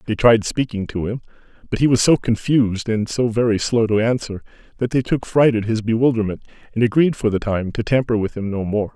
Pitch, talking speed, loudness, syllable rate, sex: 115 Hz, 230 wpm, -19 LUFS, 5.8 syllables/s, male